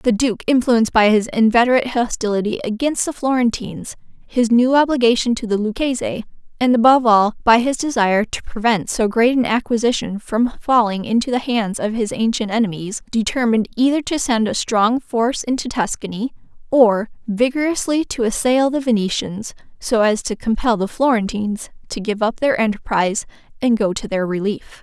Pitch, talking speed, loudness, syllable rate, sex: 230 Hz, 165 wpm, -18 LUFS, 5.4 syllables/s, female